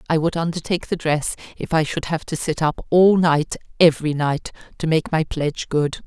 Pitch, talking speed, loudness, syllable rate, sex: 160 Hz, 200 wpm, -20 LUFS, 5.4 syllables/s, female